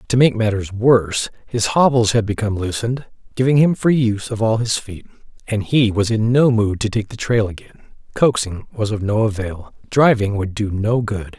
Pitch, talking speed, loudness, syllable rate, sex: 110 Hz, 200 wpm, -18 LUFS, 5.3 syllables/s, male